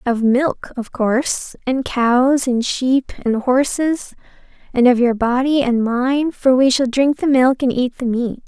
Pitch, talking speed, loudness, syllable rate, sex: 255 Hz, 175 wpm, -17 LUFS, 3.9 syllables/s, female